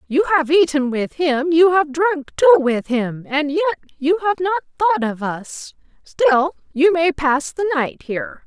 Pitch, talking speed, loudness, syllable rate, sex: 305 Hz, 185 wpm, -18 LUFS, 4.2 syllables/s, female